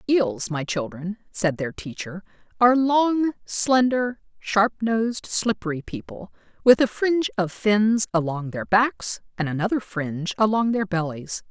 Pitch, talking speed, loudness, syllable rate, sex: 200 Hz, 140 wpm, -23 LUFS, 4.3 syllables/s, female